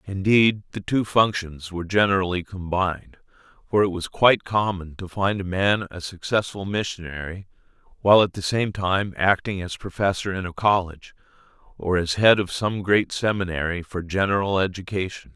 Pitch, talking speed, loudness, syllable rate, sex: 95 Hz, 155 wpm, -23 LUFS, 5.2 syllables/s, male